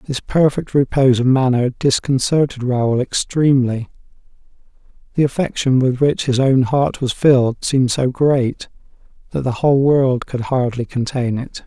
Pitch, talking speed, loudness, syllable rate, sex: 130 Hz, 145 wpm, -17 LUFS, 4.7 syllables/s, male